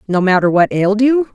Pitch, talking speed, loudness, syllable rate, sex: 205 Hz, 225 wpm, -13 LUFS, 5.9 syllables/s, female